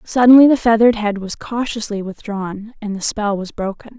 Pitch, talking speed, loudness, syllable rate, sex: 215 Hz, 180 wpm, -16 LUFS, 5.2 syllables/s, female